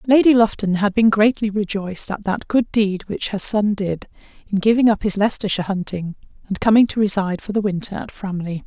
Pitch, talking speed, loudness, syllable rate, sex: 205 Hz, 200 wpm, -19 LUFS, 5.8 syllables/s, female